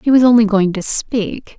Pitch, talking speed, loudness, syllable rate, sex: 220 Hz, 230 wpm, -14 LUFS, 4.7 syllables/s, female